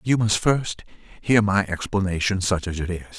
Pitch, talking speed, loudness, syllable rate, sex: 100 Hz, 205 wpm, -22 LUFS, 5.3 syllables/s, male